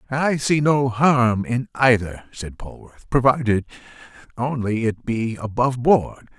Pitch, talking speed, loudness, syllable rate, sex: 120 Hz, 130 wpm, -20 LUFS, 4.0 syllables/s, male